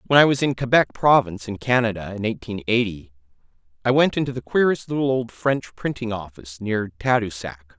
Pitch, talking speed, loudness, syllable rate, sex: 110 Hz, 175 wpm, -22 LUFS, 5.7 syllables/s, male